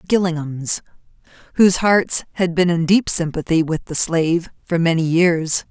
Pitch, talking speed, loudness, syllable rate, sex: 170 Hz, 145 wpm, -18 LUFS, 4.6 syllables/s, female